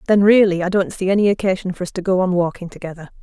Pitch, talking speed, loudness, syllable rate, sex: 190 Hz, 260 wpm, -17 LUFS, 7.1 syllables/s, female